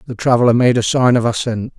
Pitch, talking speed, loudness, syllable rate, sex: 120 Hz, 235 wpm, -14 LUFS, 6.3 syllables/s, male